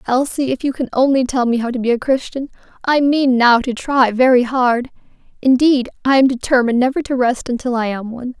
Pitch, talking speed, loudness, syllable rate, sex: 255 Hz, 215 wpm, -16 LUFS, 5.7 syllables/s, female